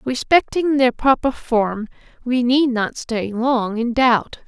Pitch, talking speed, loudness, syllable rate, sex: 245 Hz, 150 wpm, -18 LUFS, 3.5 syllables/s, female